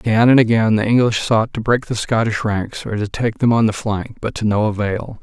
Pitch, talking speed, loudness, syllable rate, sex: 110 Hz, 250 wpm, -17 LUFS, 5.3 syllables/s, male